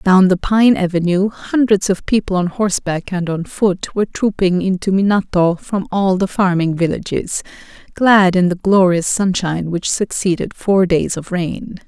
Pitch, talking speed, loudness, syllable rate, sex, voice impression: 190 Hz, 160 wpm, -16 LUFS, 4.5 syllables/s, female, feminine, adult-like, slightly muffled, slightly intellectual, slightly calm, elegant